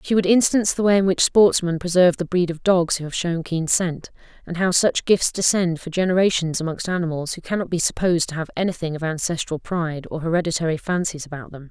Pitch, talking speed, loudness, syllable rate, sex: 170 Hz, 215 wpm, -20 LUFS, 6.1 syllables/s, female